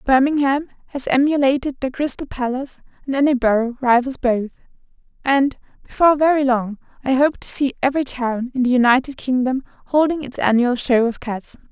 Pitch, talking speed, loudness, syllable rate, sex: 260 Hz, 155 wpm, -19 LUFS, 5.4 syllables/s, female